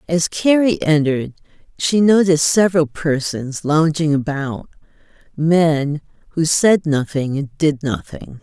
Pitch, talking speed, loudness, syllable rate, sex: 155 Hz, 105 wpm, -17 LUFS, 4.1 syllables/s, female